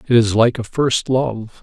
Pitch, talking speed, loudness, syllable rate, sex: 120 Hz, 220 wpm, -17 LUFS, 4.0 syllables/s, male